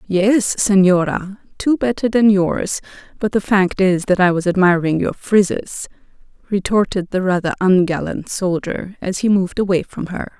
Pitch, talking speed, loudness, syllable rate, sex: 190 Hz, 155 wpm, -17 LUFS, 4.6 syllables/s, female